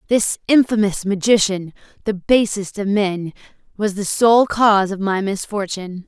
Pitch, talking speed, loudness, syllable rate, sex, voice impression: 205 Hz, 140 wpm, -18 LUFS, 4.6 syllables/s, female, feminine, adult-like, tensed, powerful, bright, clear, fluent, intellectual, slightly friendly, lively, slightly intense, sharp